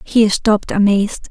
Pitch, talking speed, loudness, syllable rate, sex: 210 Hz, 140 wpm, -15 LUFS, 5.0 syllables/s, female